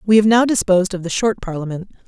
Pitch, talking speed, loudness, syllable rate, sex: 195 Hz, 230 wpm, -17 LUFS, 6.9 syllables/s, female